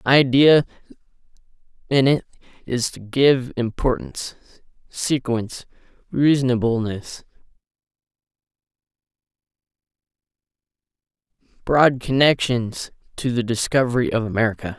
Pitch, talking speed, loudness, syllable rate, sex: 125 Hz, 70 wpm, -20 LUFS, 4.5 syllables/s, male